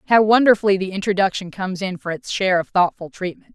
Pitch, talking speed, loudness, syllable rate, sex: 190 Hz, 205 wpm, -19 LUFS, 6.5 syllables/s, female